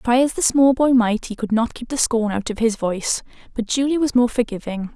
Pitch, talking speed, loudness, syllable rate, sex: 240 Hz, 255 wpm, -19 LUFS, 5.5 syllables/s, female